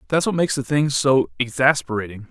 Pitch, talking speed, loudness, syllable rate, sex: 135 Hz, 180 wpm, -20 LUFS, 6.0 syllables/s, male